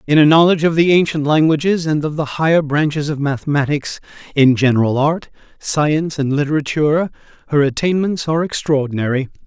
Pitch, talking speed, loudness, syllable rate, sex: 150 Hz, 150 wpm, -16 LUFS, 5.9 syllables/s, male